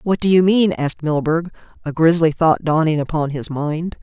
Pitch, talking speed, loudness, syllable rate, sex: 160 Hz, 195 wpm, -17 LUFS, 5.0 syllables/s, female